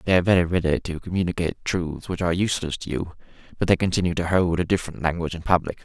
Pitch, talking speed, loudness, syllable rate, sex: 85 Hz, 225 wpm, -23 LUFS, 7.4 syllables/s, male